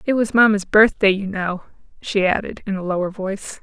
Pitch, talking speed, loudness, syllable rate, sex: 200 Hz, 200 wpm, -19 LUFS, 5.4 syllables/s, female